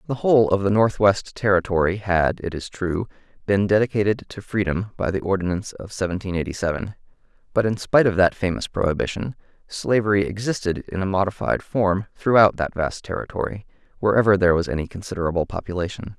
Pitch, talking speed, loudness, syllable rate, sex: 95 Hz, 165 wpm, -22 LUFS, 6.0 syllables/s, male